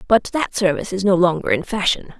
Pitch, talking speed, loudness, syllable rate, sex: 200 Hz, 220 wpm, -19 LUFS, 6.0 syllables/s, female